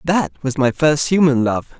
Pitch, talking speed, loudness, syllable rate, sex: 140 Hz, 200 wpm, -17 LUFS, 4.9 syllables/s, male